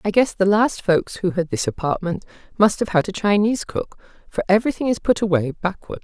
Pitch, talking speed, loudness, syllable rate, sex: 195 Hz, 210 wpm, -20 LUFS, 5.7 syllables/s, female